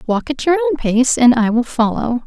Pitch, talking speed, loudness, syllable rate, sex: 235 Hz, 240 wpm, -15 LUFS, 5.1 syllables/s, female